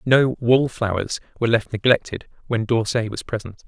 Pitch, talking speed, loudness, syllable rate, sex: 115 Hz, 145 wpm, -21 LUFS, 5.1 syllables/s, male